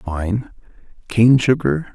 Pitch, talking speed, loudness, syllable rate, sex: 110 Hz, 90 wpm, -17 LUFS, 3.1 syllables/s, male